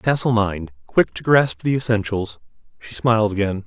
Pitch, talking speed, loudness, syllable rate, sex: 110 Hz, 145 wpm, -20 LUFS, 5.2 syllables/s, male